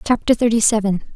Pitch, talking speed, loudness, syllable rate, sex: 220 Hz, 155 wpm, -17 LUFS, 6.3 syllables/s, female